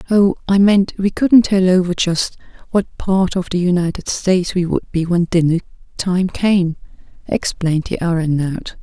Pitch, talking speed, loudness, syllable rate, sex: 180 Hz, 165 wpm, -17 LUFS, 4.7 syllables/s, female